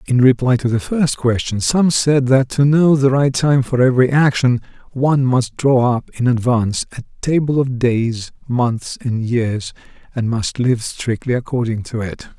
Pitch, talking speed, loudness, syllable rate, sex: 125 Hz, 180 wpm, -17 LUFS, 4.5 syllables/s, male